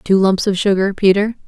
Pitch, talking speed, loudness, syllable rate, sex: 195 Hz, 205 wpm, -15 LUFS, 5.3 syllables/s, female